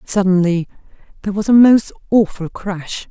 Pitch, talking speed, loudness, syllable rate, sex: 195 Hz, 135 wpm, -15 LUFS, 4.9 syllables/s, female